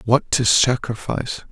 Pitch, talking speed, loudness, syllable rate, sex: 125 Hz, 120 wpm, -19 LUFS, 4.4 syllables/s, male